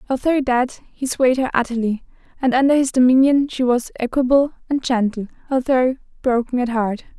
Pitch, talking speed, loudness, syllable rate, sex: 255 Hz, 160 wpm, -19 LUFS, 5.4 syllables/s, female